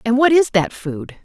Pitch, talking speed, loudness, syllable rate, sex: 225 Hz, 240 wpm, -16 LUFS, 4.6 syllables/s, female